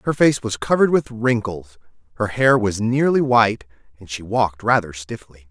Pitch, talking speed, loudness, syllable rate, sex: 110 Hz, 175 wpm, -19 LUFS, 5.1 syllables/s, male